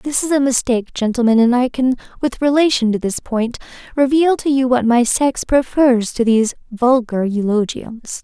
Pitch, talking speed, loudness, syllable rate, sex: 245 Hz, 175 wpm, -16 LUFS, 4.9 syllables/s, female